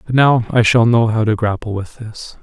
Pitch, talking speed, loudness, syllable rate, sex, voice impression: 115 Hz, 245 wpm, -15 LUFS, 5.1 syllables/s, male, masculine, adult-like, slightly soft, cool, slightly sincere, calm, slightly kind